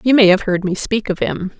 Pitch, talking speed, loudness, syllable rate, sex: 195 Hz, 300 wpm, -16 LUFS, 5.5 syllables/s, female